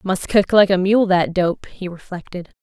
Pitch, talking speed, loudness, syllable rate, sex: 185 Hz, 205 wpm, -16 LUFS, 4.6 syllables/s, female